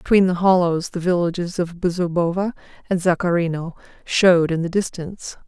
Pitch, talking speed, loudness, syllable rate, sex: 175 Hz, 145 wpm, -20 LUFS, 5.5 syllables/s, female